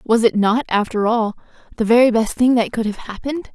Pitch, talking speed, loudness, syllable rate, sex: 230 Hz, 220 wpm, -18 LUFS, 5.8 syllables/s, female